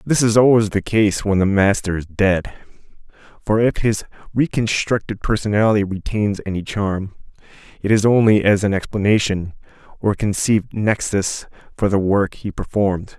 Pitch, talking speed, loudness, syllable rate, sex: 105 Hz, 145 wpm, -18 LUFS, 4.9 syllables/s, male